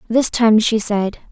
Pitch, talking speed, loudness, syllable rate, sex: 220 Hz, 185 wpm, -16 LUFS, 4.0 syllables/s, female